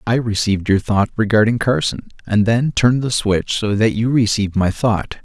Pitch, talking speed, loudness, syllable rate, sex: 110 Hz, 195 wpm, -17 LUFS, 5.2 syllables/s, male